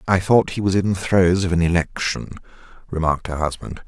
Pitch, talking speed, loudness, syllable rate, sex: 90 Hz, 200 wpm, -20 LUFS, 5.8 syllables/s, male